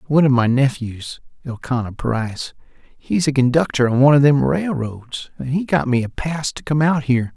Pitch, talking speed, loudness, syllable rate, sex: 130 Hz, 195 wpm, -18 LUFS, 5.1 syllables/s, male